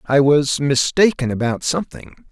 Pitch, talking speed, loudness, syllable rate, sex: 145 Hz, 130 wpm, -17 LUFS, 4.6 syllables/s, male